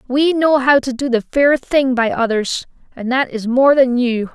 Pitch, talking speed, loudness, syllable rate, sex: 255 Hz, 205 wpm, -15 LUFS, 4.3 syllables/s, female